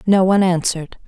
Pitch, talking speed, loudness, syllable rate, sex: 180 Hz, 165 wpm, -16 LUFS, 6.7 syllables/s, female